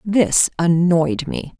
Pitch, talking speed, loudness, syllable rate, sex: 175 Hz, 115 wpm, -17 LUFS, 2.9 syllables/s, female